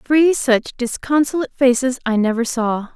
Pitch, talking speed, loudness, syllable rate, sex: 255 Hz, 140 wpm, -18 LUFS, 4.9 syllables/s, female